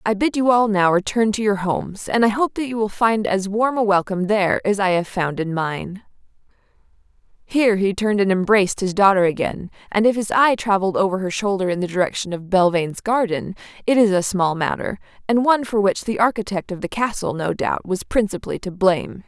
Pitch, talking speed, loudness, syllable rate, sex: 200 Hz, 215 wpm, -19 LUFS, 5.8 syllables/s, female